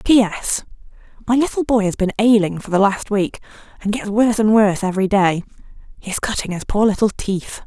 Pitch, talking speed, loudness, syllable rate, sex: 205 Hz, 195 wpm, -18 LUFS, 5.6 syllables/s, female